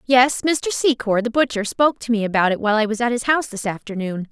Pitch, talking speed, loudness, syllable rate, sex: 235 Hz, 250 wpm, -19 LUFS, 6.2 syllables/s, female